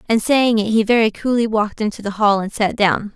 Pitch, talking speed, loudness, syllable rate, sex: 215 Hz, 245 wpm, -17 LUFS, 5.7 syllables/s, female